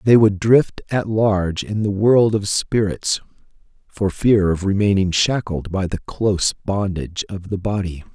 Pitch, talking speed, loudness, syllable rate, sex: 100 Hz, 160 wpm, -19 LUFS, 4.4 syllables/s, male